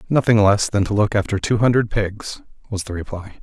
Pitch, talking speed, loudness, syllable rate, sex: 105 Hz, 210 wpm, -19 LUFS, 5.4 syllables/s, male